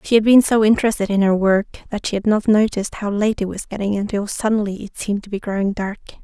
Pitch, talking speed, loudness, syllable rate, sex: 205 Hz, 250 wpm, -19 LUFS, 6.5 syllables/s, female